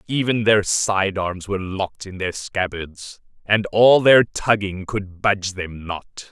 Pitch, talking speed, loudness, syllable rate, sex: 95 Hz, 160 wpm, -20 LUFS, 3.9 syllables/s, male